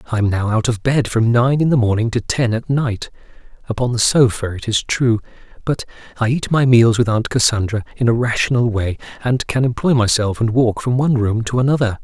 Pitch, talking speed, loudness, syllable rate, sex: 120 Hz, 220 wpm, -17 LUFS, 5.5 syllables/s, male